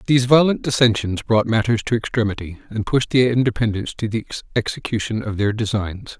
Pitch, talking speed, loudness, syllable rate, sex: 115 Hz, 165 wpm, -20 LUFS, 5.7 syllables/s, male